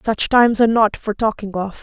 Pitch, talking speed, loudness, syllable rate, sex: 215 Hz, 230 wpm, -17 LUFS, 5.9 syllables/s, female